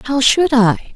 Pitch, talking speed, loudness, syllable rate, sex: 250 Hz, 190 wpm, -13 LUFS, 3.8 syllables/s, female